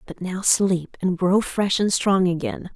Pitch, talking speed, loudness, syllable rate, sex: 185 Hz, 195 wpm, -21 LUFS, 4.0 syllables/s, female